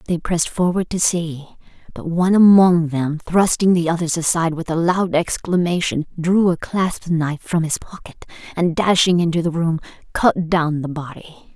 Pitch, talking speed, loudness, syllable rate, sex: 170 Hz, 170 wpm, -18 LUFS, 4.9 syllables/s, female